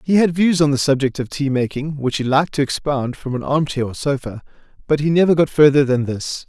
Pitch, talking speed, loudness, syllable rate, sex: 140 Hz, 240 wpm, -18 LUFS, 5.8 syllables/s, male